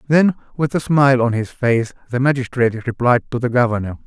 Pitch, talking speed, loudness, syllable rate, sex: 125 Hz, 190 wpm, -18 LUFS, 6.0 syllables/s, male